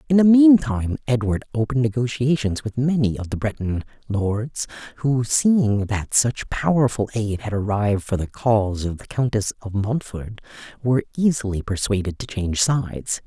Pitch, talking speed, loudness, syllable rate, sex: 115 Hz, 155 wpm, -21 LUFS, 5.0 syllables/s, male